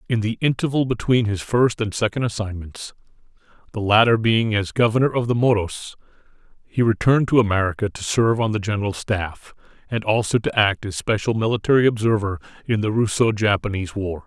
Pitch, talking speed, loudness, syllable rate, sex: 110 Hz, 170 wpm, -20 LUFS, 5.8 syllables/s, male